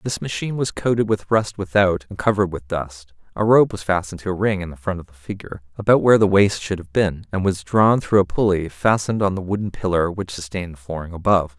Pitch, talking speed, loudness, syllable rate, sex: 95 Hz, 245 wpm, -20 LUFS, 6.3 syllables/s, male